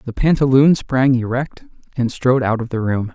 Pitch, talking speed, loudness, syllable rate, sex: 125 Hz, 190 wpm, -17 LUFS, 5.0 syllables/s, male